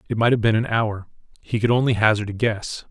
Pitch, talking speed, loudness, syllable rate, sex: 110 Hz, 225 wpm, -21 LUFS, 6.0 syllables/s, male